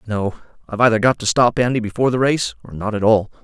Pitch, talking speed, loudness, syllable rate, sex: 115 Hz, 245 wpm, -18 LUFS, 6.9 syllables/s, male